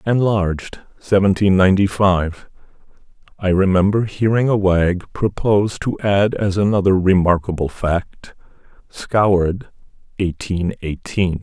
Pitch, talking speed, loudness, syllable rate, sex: 95 Hz, 100 wpm, -17 LUFS, 4.1 syllables/s, male